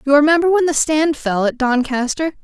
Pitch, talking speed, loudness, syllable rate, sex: 285 Hz, 200 wpm, -16 LUFS, 5.5 syllables/s, female